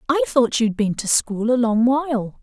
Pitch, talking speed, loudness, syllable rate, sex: 235 Hz, 220 wpm, -19 LUFS, 4.6 syllables/s, female